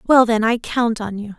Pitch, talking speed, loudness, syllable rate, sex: 225 Hz, 260 wpm, -18 LUFS, 4.9 syllables/s, female